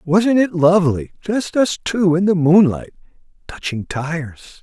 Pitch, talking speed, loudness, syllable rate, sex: 175 Hz, 130 wpm, -17 LUFS, 4.2 syllables/s, male